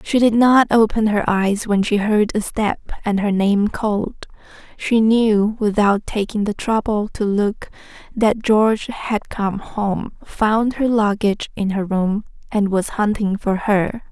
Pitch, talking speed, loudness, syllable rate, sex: 210 Hz, 165 wpm, -18 LUFS, 3.9 syllables/s, female